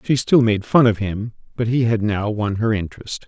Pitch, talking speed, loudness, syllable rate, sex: 110 Hz, 240 wpm, -19 LUFS, 5.2 syllables/s, male